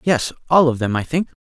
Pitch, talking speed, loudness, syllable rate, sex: 140 Hz, 250 wpm, -18 LUFS, 5.5 syllables/s, male